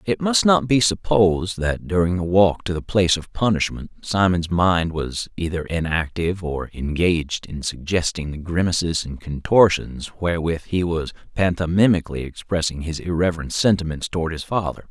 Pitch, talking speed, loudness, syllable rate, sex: 85 Hz, 155 wpm, -21 LUFS, 5.1 syllables/s, male